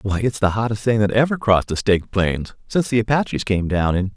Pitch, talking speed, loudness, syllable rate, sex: 105 Hz, 245 wpm, -19 LUFS, 6.1 syllables/s, male